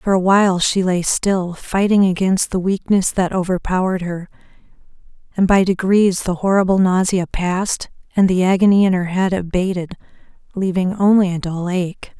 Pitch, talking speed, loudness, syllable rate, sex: 185 Hz, 155 wpm, -17 LUFS, 5.0 syllables/s, female